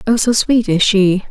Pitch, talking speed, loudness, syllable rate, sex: 210 Hz, 230 wpm, -13 LUFS, 4.5 syllables/s, female